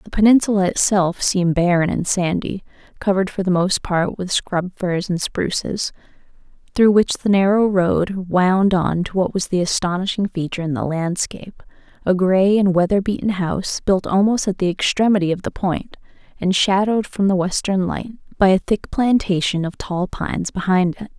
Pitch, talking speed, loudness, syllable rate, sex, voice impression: 190 Hz, 175 wpm, -19 LUFS, 5.0 syllables/s, female, feminine, adult-like, relaxed, slightly weak, bright, soft, clear, fluent, raspy, intellectual, calm, reassuring, slightly kind, modest